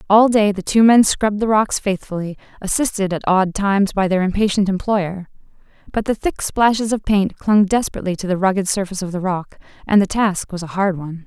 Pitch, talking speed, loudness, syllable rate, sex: 195 Hz, 210 wpm, -18 LUFS, 5.8 syllables/s, female